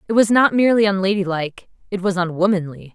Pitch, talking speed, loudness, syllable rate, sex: 195 Hz, 165 wpm, -18 LUFS, 6.7 syllables/s, female